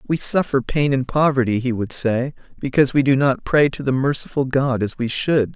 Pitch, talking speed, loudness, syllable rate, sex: 130 Hz, 215 wpm, -19 LUFS, 5.2 syllables/s, male